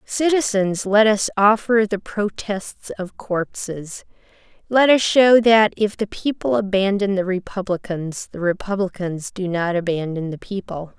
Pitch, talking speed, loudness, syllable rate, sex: 195 Hz, 135 wpm, -20 LUFS, 4.2 syllables/s, female